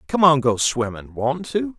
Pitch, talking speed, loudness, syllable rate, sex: 145 Hz, 170 wpm, -20 LUFS, 4.3 syllables/s, male